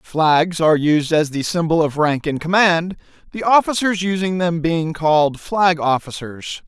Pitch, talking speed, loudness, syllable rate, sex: 165 Hz, 160 wpm, -17 LUFS, 4.3 syllables/s, male